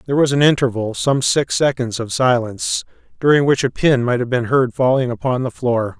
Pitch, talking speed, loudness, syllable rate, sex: 125 Hz, 190 wpm, -17 LUFS, 5.5 syllables/s, male